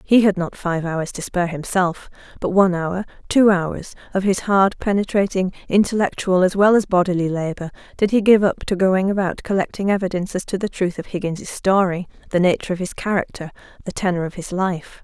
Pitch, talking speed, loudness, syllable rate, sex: 185 Hz, 190 wpm, -20 LUFS, 5.6 syllables/s, female